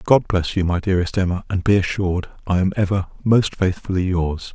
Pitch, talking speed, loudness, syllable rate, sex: 95 Hz, 200 wpm, -20 LUFS, 5.7 syllables/s, male